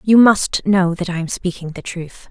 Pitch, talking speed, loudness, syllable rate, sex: 185 Hz, 235 wpm, -17 LUFS, 4.5 syllables/s, female